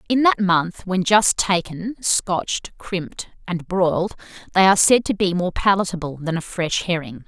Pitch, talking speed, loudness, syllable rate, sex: 180 Hz, 175 wpm, -20 LUFS, 4.9 syllables/s, female